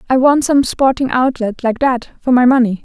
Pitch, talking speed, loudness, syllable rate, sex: 255 Hz, 210 wpm, -14 LUFS, 5.0 syllables/s, female